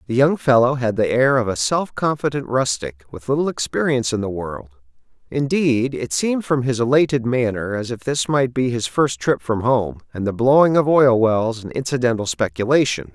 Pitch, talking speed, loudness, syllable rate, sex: 125 Hz, 195 wpm, -19 LUFS, 5.2 syllables/s, male